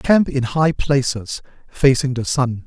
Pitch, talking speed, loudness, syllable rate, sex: 135 Hz, 160 wpm, -18 LUFS, 3.8 syllables/s, male